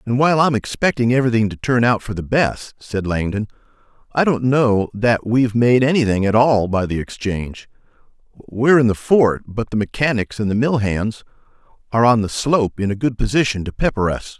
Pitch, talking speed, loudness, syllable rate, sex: 115 Hz, 190 wpm, -18 LUFS, 5.4 syllables/s, male